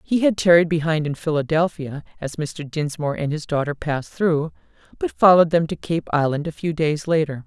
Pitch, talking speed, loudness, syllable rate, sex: 160 Hz, 195 wpm, -21 LUFS, 5.5 syllables/s, female